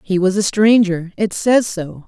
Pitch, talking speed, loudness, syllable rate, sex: 195 Hz, 200 wpm, -16 LUFS, 4.2 syllables/s, female